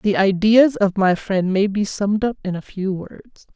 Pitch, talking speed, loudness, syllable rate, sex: 200 Hz, 220 wpm, -19 LUFS, 4.4 syllables/s, female